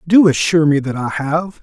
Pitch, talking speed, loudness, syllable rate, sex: 150 Hz, 220 wpm, -15 LUFS, 5.4 syllables/s, male